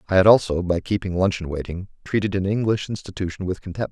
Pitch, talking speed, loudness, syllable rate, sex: 95 Hz, 200 wpm, -22 LUFS, 6.3 syllables/s, male